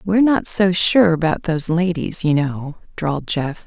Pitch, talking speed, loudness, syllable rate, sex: 170 Hz, 180 wpm, -18 LUFS, 4.7 syllables/s, female